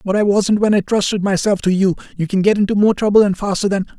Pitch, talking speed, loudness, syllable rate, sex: 200 Hz, 270 wpm, -16 LUFS, 6.5 syllables/s, male